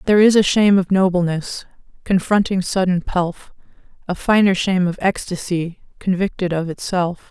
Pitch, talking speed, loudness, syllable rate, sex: 185 Hz, 140 wpm, -18 LUFS, 5.1 syllables/s, female